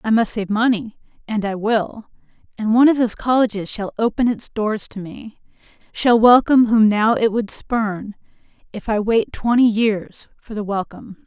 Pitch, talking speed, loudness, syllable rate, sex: 220 Hz, 170 wpm, -18 LUFS, 4.8 syllables/s, female